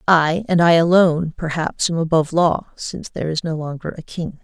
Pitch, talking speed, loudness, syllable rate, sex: 165 Hz, 190 wpm, -19 LUFS, 5.5 syllables/s, female